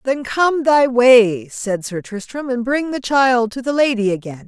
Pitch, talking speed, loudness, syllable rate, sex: 245 Hz, 200 wpm, -16 LUFS, 4.2 syllables/s, female